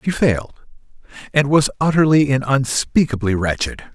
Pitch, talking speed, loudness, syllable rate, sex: 135 Hz, 120 wpm, -17 LUFS, 5.0 syllables/s, male